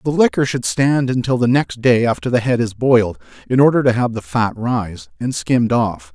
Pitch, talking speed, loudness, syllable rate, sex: 115 Hz, 225 wpm, -17 LUFS, 5.2 syllables/s, male